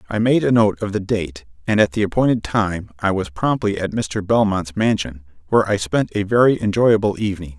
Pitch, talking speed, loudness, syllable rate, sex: 100 Hz, 205 wpm, -19 LUFS, 5.4 syllables/s, male